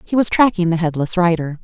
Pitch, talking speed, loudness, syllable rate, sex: 180 Hz, 220 wpm, -16 LUFS, 5.9 syllables/s, female